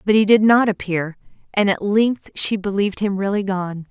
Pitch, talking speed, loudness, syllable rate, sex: 200 Hz, 200 wpm, -19 LUFS, 5.0 syllables/s, female